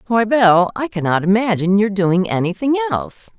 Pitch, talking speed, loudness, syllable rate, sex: 200 Hz, 160 wpm, -16 LUFS, 5.7 syllables/s, female